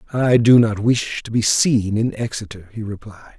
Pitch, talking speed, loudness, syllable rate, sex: 110 Hz, 195 wpm, -17 LUFS, 4.8 syllables/s, male